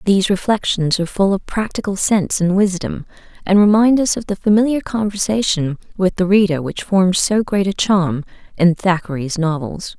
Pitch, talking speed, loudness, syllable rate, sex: 190 Hz, 170 wpm, -17 LUFS, 5.1 syllables/s, female